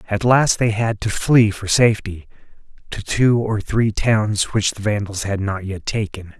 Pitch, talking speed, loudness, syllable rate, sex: 105 Hz, 190 wpm, -18 LUFS, 4.3 syllables/s, male